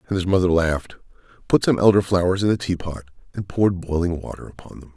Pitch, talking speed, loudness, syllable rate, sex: 90 Hz, 220 wpm, -20 LUFS, 6.5 syllables/s, male